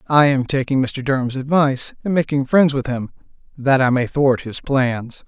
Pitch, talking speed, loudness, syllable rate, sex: 135 Hz, 195 wpm, -18 LUFS, 4.8 syllables/s, male